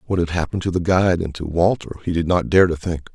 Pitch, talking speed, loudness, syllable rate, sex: 85 Hz, 285 wpm, -20 LUFS, 6.6 syllables/s, male